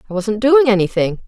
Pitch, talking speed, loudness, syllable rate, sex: 225 Hz, 190 wpm, -15 LUFS, 5.8 syllables/s, female